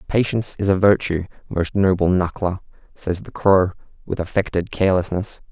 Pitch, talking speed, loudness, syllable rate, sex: 95 Hz, 140 wpm, -20 LUFS, 5.2 syllables/s, male